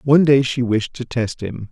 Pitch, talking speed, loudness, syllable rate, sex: 125 Hz, 245 wpm, -18 LUFS, 5.0 syllables/s, male